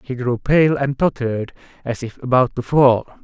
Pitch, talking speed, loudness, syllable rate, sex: 130 Hz, 185 wpm, -18 LUFS, 4.7 syllables/s, male